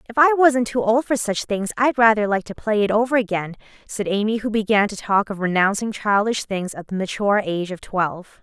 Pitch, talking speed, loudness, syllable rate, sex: 210 Hz, 230 wpm, -20 LUFS, 5.6 syllables/s, female